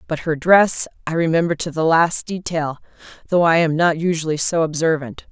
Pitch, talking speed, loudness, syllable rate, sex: 165 Hz, 180 wpm, -18 LUFS, 5.2 syllables/s, female